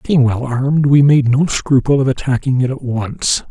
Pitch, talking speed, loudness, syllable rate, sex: 135 Hz, 205 wpm, -14 LUFS, 4.8 syllables/s, male